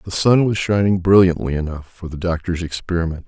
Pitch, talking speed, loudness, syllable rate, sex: 90 Hz, 185 wpm, -18 LUFS, 5.7 syllables/s, male